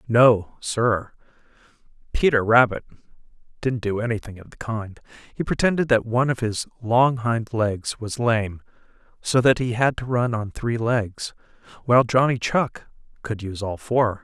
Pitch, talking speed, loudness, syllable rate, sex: 115 Hz, 155 wpm, -22 LUFS, 4.5 syllables/s, male